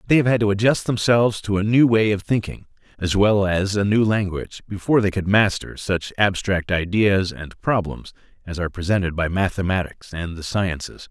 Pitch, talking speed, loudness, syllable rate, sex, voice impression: 100 Hz, 190 wpm, -20 LUFS, 5.3 syllables/s, male, masculine, adult-like, slightly thick, cool, slightly wild